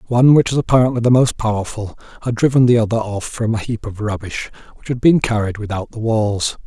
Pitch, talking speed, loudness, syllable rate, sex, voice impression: 115 Hz, 215 wpm, -17 LUFS, 5.9 syllables/s, male, middle-aged, slightly powerful, hard, slightly halting, raspy, cool, calm, mature, wild, slightly lively, strict, slightly intense